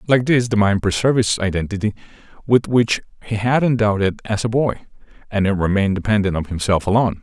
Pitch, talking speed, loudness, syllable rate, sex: 105 Hz, 190 wpm, -18 LUFS, 6.4 syllables/s, male